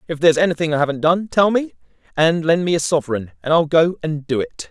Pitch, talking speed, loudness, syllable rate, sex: 160 Hz, 245 wpm, -18 LUFS, 6.2 syllables/s, male